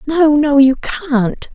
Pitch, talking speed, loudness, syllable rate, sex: 285 Hz, 155 wpm, -13 LUFS, 2.9 syllables/s, female